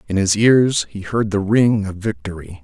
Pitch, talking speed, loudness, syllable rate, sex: 100 Hz, 205 wpm, -17 LUFS, 4.6 syllables/s, male